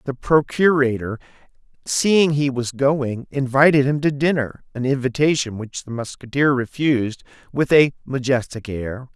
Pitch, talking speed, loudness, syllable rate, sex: 135 Hz, 125 wpm, -20 LUFS, 4.5 syllables/s, male